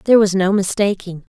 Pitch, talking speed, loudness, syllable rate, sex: 195 Hz, 180 wpm, -17 LUFS, 6.1 syllables/s, female